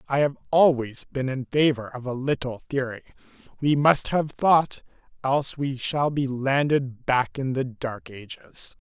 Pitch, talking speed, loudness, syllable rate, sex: 135 Hz, 165 wpm, -24 LUFS, 4.3 syllables/s, male